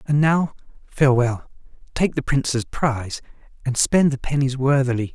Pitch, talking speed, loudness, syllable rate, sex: 135 Hz, 140 wpm, -21 LUFS, 4.9 syllables/s, male